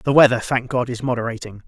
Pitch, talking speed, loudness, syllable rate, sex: 120 Hz, 215 wpm, -19 LUFS, 6.2 syllables/s, male